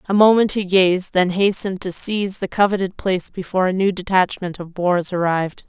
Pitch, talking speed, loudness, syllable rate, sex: 185 Hz, 190 wpm, -19 LUFS, 5.8 syllables/s, female